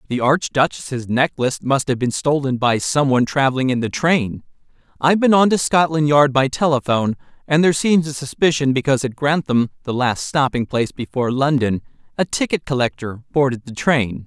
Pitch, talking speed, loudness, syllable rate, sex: 140 Hz, 170 wpm, -18 LUFS, 5.6 syllables/s, male